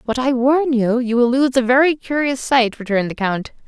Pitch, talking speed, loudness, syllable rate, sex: 250 Hz, 230 wpm, -17 LUFS, 5.2 syllables/s, female